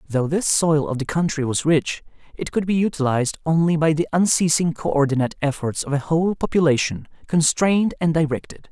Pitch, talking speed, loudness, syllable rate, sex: 155 Hz, 180 wpm, -20 LUFS, 5.8 syllables/s, male